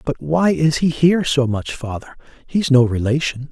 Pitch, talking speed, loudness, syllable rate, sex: 145 Hz, 190 wpm, -18 LUFS, 4.9 syllables/s, male